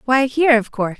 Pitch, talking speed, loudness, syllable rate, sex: 250 Hz, 240 wpm, -16 LUFS, 7.1 syllables/s, female